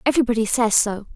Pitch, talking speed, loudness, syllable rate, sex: 230 Hz, 155 wpm, -19 LUFS, 7.1 syllables/s, female